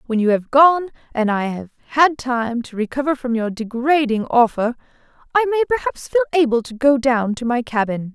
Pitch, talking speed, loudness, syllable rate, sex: 255 Hz, 190 wpm, -18 LUFS, 5.1 syllables/s, female